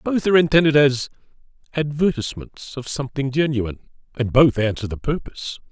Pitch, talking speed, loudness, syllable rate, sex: 135 Hz, 135 wpm, -20 LUFS, 6.0 syllables/s, male